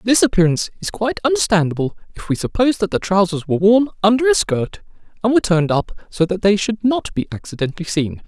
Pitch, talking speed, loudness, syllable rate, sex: 200 Hz, 205 wpm, -18 LUFS, 6.6 syllables/s, male